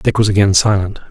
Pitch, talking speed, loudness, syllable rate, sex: 100 Hz, 215 wpm, -13 LUFS, 6.1 syllables/s, male